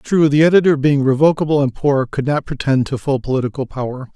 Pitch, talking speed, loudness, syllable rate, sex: 140 Hz, 200 wpm, -16 LUFS, 5.9 syllables/s, male